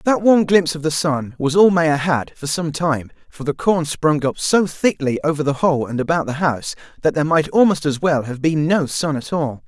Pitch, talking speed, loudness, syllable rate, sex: 155 Hz, 240 wpm, -18 LUFS, 5.2 syllables/s, male